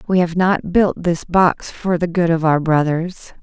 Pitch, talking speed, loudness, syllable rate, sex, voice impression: 170 Hz, 210 wpm, -17 LUFS, 4.1 syllables/s, female, feminine, adult-like, tensed, slightly powerful, slightly soft, clear, intellectual, calm, elegant, slightly lively, sharp